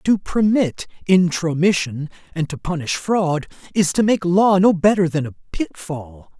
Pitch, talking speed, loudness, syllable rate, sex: 175 Hz, 150 wpm, -19 LUFS, 4.1 syllables/s, male